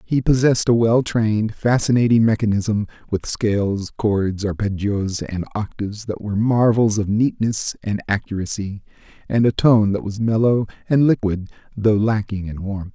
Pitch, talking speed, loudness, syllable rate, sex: 105 Hz, 150 wpm, -19 LUFS, 4.8 syllables/s, male